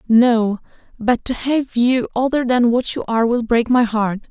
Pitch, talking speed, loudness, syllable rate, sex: 235 Hz, 195 wpm, -17 LUFS, 4.4 syllables/s, female